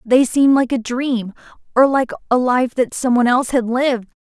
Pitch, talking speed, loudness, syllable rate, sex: 250 Hz, 210 wpm, -17 LUFS, 5.6 syllables/s, female